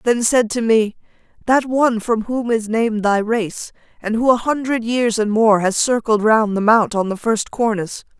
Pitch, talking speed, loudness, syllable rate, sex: 225 Hz, 205 wpm, -17 LUFS, 4.8 syllables/s, female